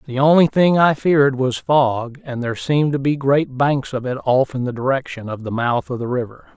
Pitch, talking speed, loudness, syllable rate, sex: 135 Hz, 240 wpm, -18 LUFS, 5.3 syllables/s, male